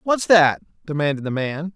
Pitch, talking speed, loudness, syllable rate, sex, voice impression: 160 Hz, 170 wpm, -19 LUFS, 4.9 syllables/s, male, masculine, adult-like, tensed, bright, clear, fluent, slightly intellectual, slightly refreshing, friendly, unique, lively, kind